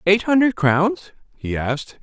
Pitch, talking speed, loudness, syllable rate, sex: 185 Hz, 150 wpm, -19 LUFS, 4.1 syllables/s, male